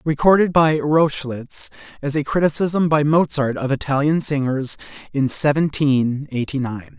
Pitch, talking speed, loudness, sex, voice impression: 145 Hz, 130 wpm, -19 LUFS, male, masculine, adult-like, slightly middle-aged, slightly thick, tensed, slightly weak, very bright, slightly hard, very clear, very fluent, very cool, intellectual, very refreshing, very sincere, slightly calm, very friendly, reassuring, unique, wild, very lively, kind, slightly intense, light